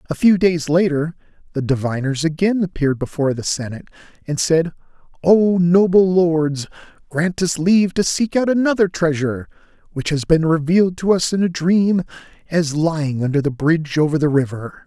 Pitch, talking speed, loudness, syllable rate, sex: 165 Hz, 165 wpm, -18 LUFS, 5.3 syllables/s, male